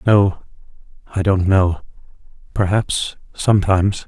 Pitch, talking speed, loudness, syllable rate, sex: 95 Hz, 45 wpm, -18 LUFS, 4.3 syllables/s, male